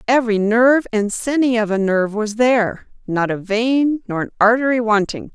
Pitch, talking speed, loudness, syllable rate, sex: 225 Hz, 170 wpm, -17 LUFS, 5.2 syllables/s, female